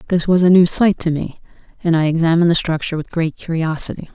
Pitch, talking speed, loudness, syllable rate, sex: 165 Hz, 215 wpm, -16 LUFS, 6.6 syllables/s, female